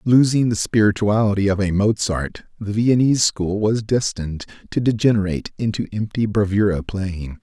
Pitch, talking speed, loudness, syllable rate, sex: 105 Hz, 135 wpm, -19 LUFS, 5.1 syllables/s, male